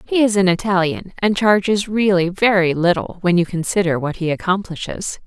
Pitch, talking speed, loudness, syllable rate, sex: 185 Hz, 170 wpm, -18 LUFS, 5.2 syllables/s, female